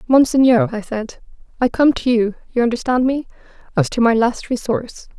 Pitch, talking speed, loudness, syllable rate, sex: 245 Hz, 175 wpm, -17 LUFS, 5.0 syllables/s, female